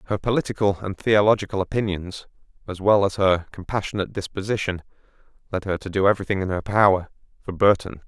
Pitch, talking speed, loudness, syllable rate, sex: 100 Hz, 155 wpm, -22 LUFS, 6.5 syllables/s, male